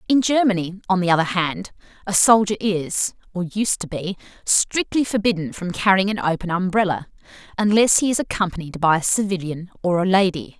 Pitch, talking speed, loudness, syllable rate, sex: 190 Hz, 160 wpm, -20 LUFS, 5.4 syllables/s, female